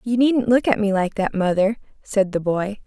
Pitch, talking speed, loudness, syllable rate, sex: 210 Hz, 230 wpm, -20 LUFS, 4.8 syllables/s, female